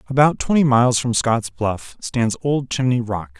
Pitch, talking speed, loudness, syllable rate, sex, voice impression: 120 Hz, 175 wpm, -19 LUFS, 4.6 syllables/s, male, adult-like, slightly middle-aged, thick, tensed, slightly powerful, bright, slightly soft, slightly clear, fluent, cool, very intellectual, slightly refreshing, very sincere, very calm, mature, reassuring, slightly unique, elegant, slightly wild, slightly sweet, lively, kind, slightly modest